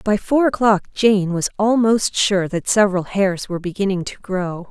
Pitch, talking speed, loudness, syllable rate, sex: 200 Hz, 180 wpm, -18 LUFS, 4.8 syllables/s, female